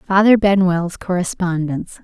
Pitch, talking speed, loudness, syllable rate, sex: 185 Hz, 90 wpm, -17 LUFS, 4.6 syllables/s, female